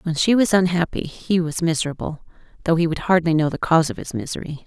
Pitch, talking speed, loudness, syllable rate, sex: 170 Hz, 220 wpm, -20 LUFS, 6.2 syllables/s, female